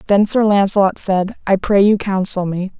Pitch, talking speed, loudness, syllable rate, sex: 195 Hz, 195 wpm, -15 LUFS, 4.9 syllables/s, female